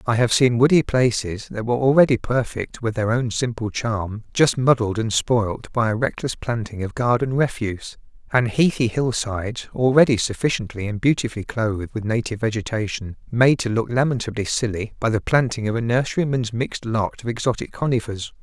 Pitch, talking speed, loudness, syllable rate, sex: 115 Hz, 170 wpm, -21 LUFS, 5.4 syllables/s, male